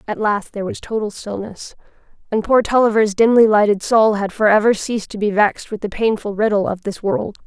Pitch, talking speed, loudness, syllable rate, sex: 210 Hz, 200 wpm, -17 LUFS, 5.7 syllables/s, female